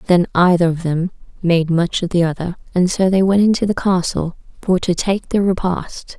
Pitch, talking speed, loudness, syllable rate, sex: 180 Hz, 205 wpm, -17 LUFS, 4.9 syllables/s, female